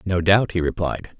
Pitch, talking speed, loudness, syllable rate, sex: 90 Hz, 200 wpm, -20 LUFS, 4.7 syllables/s, male